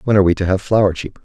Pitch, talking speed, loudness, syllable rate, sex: 95 Hz, 340 wpm, -16 LUFS, 8.0 syllables/s, male